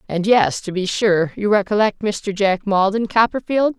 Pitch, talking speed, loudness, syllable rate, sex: 205 Hz, 145 wpm, -18 LUFS, 4.5 syllables/s, female